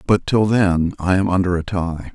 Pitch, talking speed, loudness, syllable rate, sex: 95 Hz, 225 wpm, -18 LUFS, 4.6 syllables/s, male